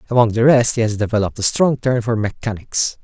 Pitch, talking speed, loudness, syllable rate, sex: 115 Hz, 215 wpm, -17 LUFS, 6.1 syllables/s, male